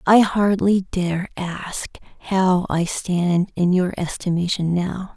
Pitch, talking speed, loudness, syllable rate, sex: 180 Hz, 130 wpm, -21 LUFS, 3.4 syllables/s, female